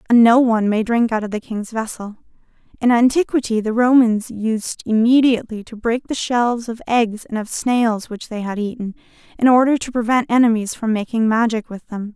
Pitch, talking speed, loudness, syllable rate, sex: 230 Hz, 195 wpm, -18 LUFS, 5.2 syllables/s, female